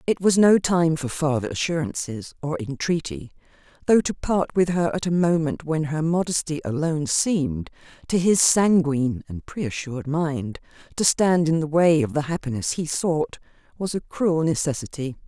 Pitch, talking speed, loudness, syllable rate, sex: 155 Hz, 165 wpm, -22 LUFS, 4.8 syllables/s, female